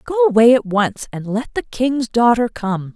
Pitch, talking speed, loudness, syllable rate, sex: 235 Hz, 205 wpm, -17 LUFS, 4.5 syllables/s, female